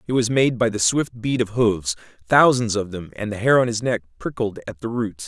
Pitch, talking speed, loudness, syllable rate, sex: 110 Hz, 250 wpm, -21 LUFS, 5.4 syllables/s, male